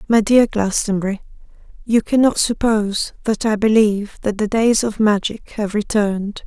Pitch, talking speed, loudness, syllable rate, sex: 215 Hz, 150 wpm, -17 LUFS, 4.9 syllables/s, female